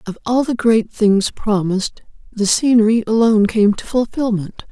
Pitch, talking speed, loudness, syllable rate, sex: 220 Hz, 155 wpm, -16 LUFS, 4.9 syllables/s, female